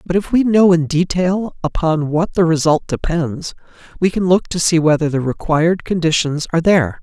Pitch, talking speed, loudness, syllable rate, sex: 165 Hz, 190 wpm, -16 LUFS, 5.2 syllables/s, male